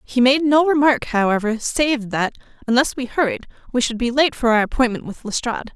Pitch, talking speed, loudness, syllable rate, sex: 245 Hz, 200 wpm, -19 LUFS, 5.8 syllables/s, female